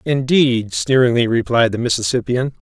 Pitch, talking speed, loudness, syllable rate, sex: 125 Hz, 110 wpm, -16 LUFS, 4.8 syllables/s, male